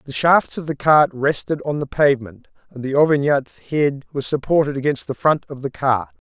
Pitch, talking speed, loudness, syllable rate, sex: 140 Hz, 200 wpm, -19 LUFS, 5.1 syllables/s, male